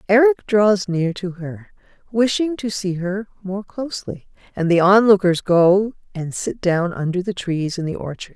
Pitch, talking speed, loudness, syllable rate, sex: 195 Hz, 170 wpm, -19 LUFS, 4.6 syllables/s, female